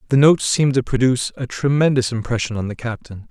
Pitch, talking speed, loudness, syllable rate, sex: 125 Hz, 200 wpm, -18 LUFS, 6.6 syllables/s, male